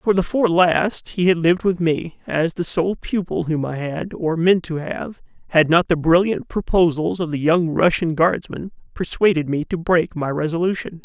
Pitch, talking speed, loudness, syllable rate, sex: 170 Hz, 195 wpm, -19 LUFS, 4.6 syllables/s, male